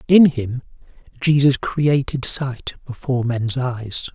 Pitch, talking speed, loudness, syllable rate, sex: 130 Hz, 115 wpm, -19 LUFS, 3.7 syllables/s, male